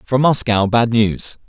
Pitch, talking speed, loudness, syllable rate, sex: 115 Hz, 160 wpm, -15 LUFS, 3.8 syllables/s, male